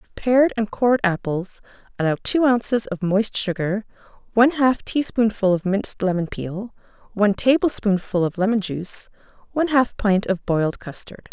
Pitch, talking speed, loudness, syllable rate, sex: 210 Hz, 155 wpm, -21 LUFS, 5.2 syllables/s, female